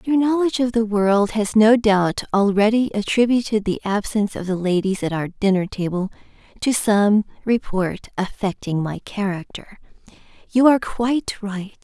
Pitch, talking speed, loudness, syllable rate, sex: 210 Hz, 145 wpm, -20 LUFS, 4.8 syllables/s, female